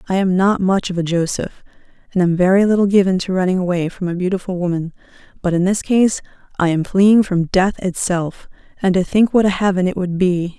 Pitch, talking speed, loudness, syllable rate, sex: 185 Hz, 215 wpm, -17 LUFS, 5.6 syllables/s, female